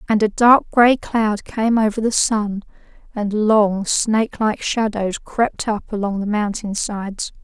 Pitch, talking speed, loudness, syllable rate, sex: 215 Hz, 155 wpm, -18 LUFS, 4.1 syllables/s, female